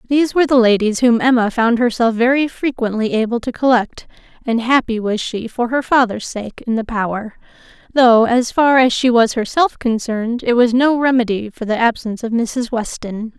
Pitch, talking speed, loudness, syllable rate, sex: 235 Hz, 190 wpm, -16 LUFS, 5.2 syllables/s, female